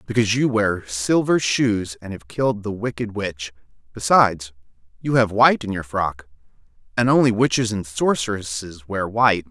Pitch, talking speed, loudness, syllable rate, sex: 105 Hz, 160 wpm, -20 LUFS, 5.1 syllables/s, male